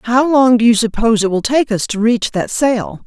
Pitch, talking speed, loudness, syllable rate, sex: 230 Hz, 255 wpm, -14 LUFS, 5.0 syllables/s, female